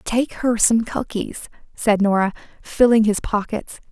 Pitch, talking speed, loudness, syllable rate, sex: 220 Hz, 140 wpm, -19 LUFS, 4.1 syllables/s, female